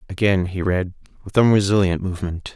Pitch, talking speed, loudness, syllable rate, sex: 95 Hz, 140 wpm, -20 LUFS, 5.8 syllables/s, male